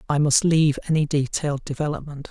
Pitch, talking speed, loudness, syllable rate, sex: 150 Hz, 155 wpm, -22 LUFS, 6.4 syllables/s, male